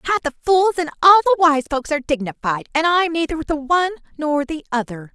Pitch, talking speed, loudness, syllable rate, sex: 310 Hz, 210 wpm, -18 LUFS, 6.0 syllables/s, female